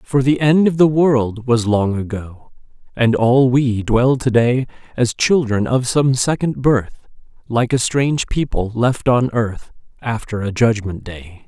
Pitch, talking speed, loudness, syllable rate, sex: 120 Hz, 165 wpm, -17 LUFS, 4.0 syllables/s, male